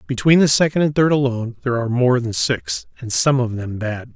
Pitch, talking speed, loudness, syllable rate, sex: 125 Hz, 230 wpm, -18 LUFS, 5.8 syllables/s, male